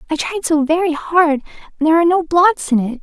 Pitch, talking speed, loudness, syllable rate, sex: 320 Hz, 240 wpm, -15 LUFS, 6.1 syllables/s, female